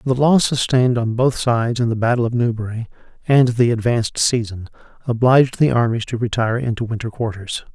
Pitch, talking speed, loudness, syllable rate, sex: 120 Hz, 180 wpm, -18 LUFS, 5.8 syllables/s, male